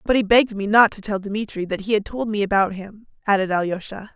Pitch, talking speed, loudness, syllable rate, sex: 205 Hz, 245 wpm, -20 LUFS, 6.0 syllables/s, female